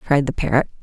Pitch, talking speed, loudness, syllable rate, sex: 135 Hz, 215 wpm, -20 LUFS, 7.6 syllables/s, female